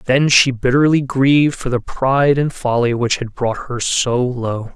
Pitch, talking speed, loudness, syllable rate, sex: 130 Hz, 190 wpm, -16 LUFS, 4.3 syllables/s, male